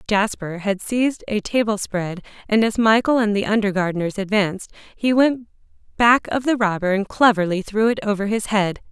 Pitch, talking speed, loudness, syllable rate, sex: 210 Hz, 175 wpm, -20 LUFS, 5.2 syllables/s, female